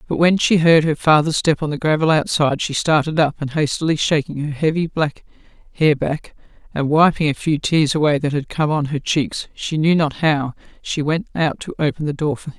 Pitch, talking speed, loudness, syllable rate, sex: 155 Hz, 225 wpm, -18 LUFS, 5.4 syllables/s, female